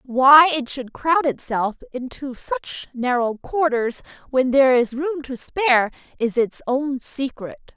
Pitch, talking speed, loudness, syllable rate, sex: 265 Hz, 145 wpm, -20 LUFS, 3.9 syllables/s, female